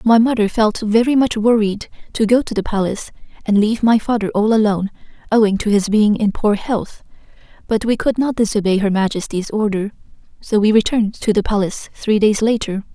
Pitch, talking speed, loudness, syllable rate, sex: 215 Hz, 190 wpm, -17 LUFS, 5.7 syllables/s, female